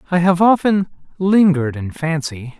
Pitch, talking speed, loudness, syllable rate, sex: 170 Hz, 140 wpm, -16 LUFS, 4.9 syllables/s, male